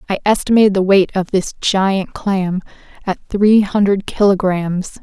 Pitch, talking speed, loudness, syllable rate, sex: 195 Hz, 145 wpm, -15 LUFS, 4.2 syllables/s, female